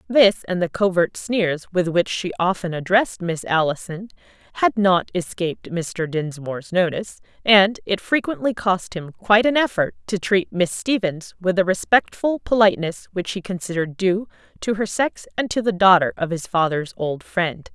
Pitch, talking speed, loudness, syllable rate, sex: 190 Hz, 170 wpm, -20 LUFS, 4.8 syllables/s, female